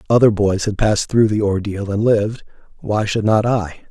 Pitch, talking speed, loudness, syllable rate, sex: 105 Hz, 200 wpm, -17 LUFS, 5.1 syllables/s, male